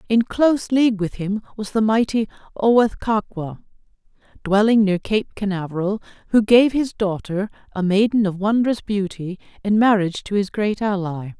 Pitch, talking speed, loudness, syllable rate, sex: 205 Hz, 145 wpm, -20 LUFS, 4.9 syllables/s, female